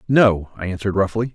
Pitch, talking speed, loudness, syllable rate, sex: 100 Hz, 180 wpm, -20 LUFS, 6.3 syllables/s, male